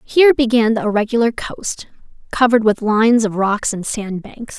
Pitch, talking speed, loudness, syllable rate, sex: 225 Hz, 155 wpm, -16 LUFS, 5.1 syllables/s, female